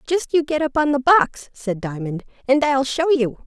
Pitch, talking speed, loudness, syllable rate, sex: 270 Hz, 225 wpm, -19 LUFS, 4.7 syllables/s, female